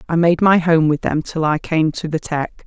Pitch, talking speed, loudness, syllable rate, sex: 160 Hz, 270 wpm, -17 LUFS, 4.8 syllables/s, female